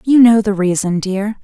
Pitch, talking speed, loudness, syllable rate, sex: 205 Hz, 210 wpm, -14 LUFS, 4.7 syllables/s, female